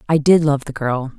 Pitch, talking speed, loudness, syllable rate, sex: 145 Hz, 255 wpm, -17 LUFS, 5.2 syllables/s, female